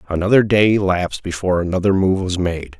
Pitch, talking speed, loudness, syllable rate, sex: 90 Hz, 170 wpm, -17 LUFS, 6.1 syllables/s, male